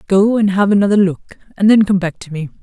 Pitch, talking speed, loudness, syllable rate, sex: 200 Hz, 250 wpm, -13 LUFS, 6.0 syllables/s, female